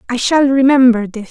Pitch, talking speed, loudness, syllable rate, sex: 250 Hz, 185 wpm, -12 LUFS, 5.3 syllables/s, female